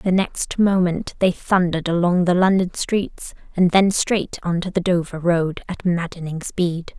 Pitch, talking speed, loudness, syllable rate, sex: 175 Hz, 170 wpm, -20 LUFS, 4.2 syllables/s, female